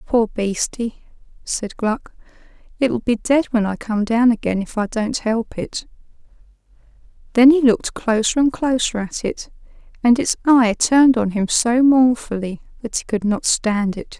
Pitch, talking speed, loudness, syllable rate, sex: 230 Hz, 165 wpm, -18 LUFS, 4.4 syllables/s, female